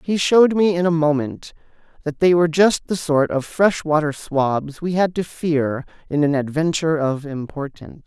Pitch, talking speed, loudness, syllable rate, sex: 155 Hz, 185 wpm, -19 LUFS, 4.9 syllables/s, male